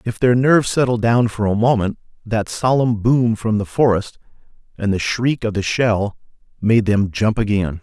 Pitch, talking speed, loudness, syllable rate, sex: 110 Hz, 185 wpm, -18 LUFS, 4.6 syllables/s, male